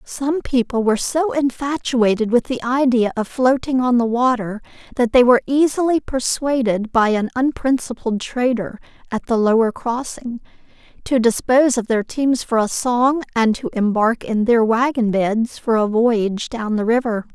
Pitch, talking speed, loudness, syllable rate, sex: 240 Hz, 165 wpm, -18 LUFS, 4.6 syllables/s, female